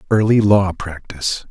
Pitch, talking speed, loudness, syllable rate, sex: 95 Hz, 120 wpm, -16 LUFS, 4.7 syllables/s, male